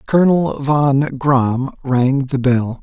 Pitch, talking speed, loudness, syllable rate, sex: 135 Hz, 130 wpm, -16 LUFS, 3.1 syllables/s, male